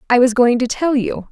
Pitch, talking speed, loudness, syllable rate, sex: 250 Hz, 275 wpm, -15 LUFS, 5.3 syllables/s, female